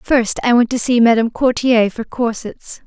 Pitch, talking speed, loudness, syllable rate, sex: 235 Hz, 190 wpm, -15 LUFS, 4.4 syllables/s, female